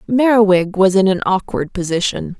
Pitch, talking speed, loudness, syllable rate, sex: 195 Hz, 150 wpm, -15 LUFS, 5.0 syllables/s, female